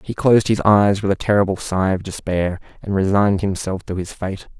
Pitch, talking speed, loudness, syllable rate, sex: 100 Hz, 210 wpm, -19 LUFS, 5.5 syllables/s, male